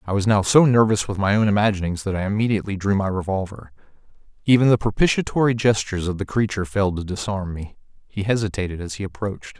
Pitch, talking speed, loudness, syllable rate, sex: 100 Hz, 195 wpm, -21 LUFS, 6.8 syllables/s, male